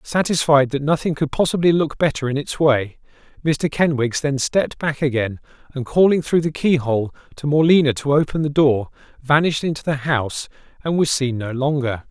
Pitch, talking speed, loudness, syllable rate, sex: 145 Hz, 180 wpm, -19 LUFS, 5.4 syllables/s, male